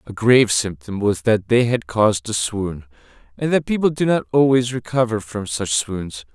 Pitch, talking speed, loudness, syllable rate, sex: 120 Hz, 190 wpm, -19 LUFS, 4.8 syllables/s, male